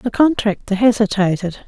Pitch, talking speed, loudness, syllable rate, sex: 210 Hz, 110 wpm, -17 LUFS, 4.9 syllables/s, female